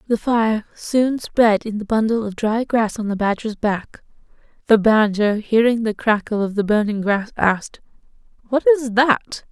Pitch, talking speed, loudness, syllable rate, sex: 220 Hz, 170 wpm, -19 LUFS, 4.3 syllables/s, female